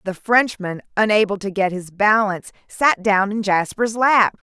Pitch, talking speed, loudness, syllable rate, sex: 205 Hz, 160 wpm, -18 LUFS, 4.5 syllables/s, female